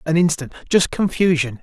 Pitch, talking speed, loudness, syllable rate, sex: 160 Hz, 110 wpm, -19 LUFS, 5.2 syllables/s, male